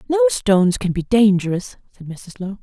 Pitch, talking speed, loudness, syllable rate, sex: 190 Hz, 185 wpm, -17 LUFS, 5.0 syllables/s, female